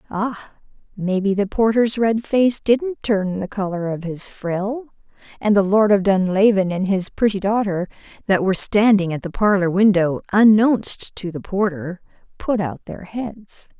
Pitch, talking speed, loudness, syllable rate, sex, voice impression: 200 Hz, 160 wpm, -19 LUFS, 4.3 syllables/s, female, feminine, middle-aged, tensed, powerful, bright, clear, intellectual, calm, slightly friendly, elegant, lively, slightly sharp